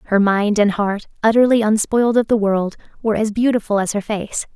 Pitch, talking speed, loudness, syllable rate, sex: 215 Hz, 195 wpm, -17 LUFS, 5.7 syllables/s, female